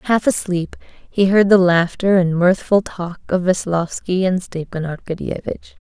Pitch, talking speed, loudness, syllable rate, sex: 180 Hz, 145 wpm, -18 LUFS, 4.3 syllables/s, female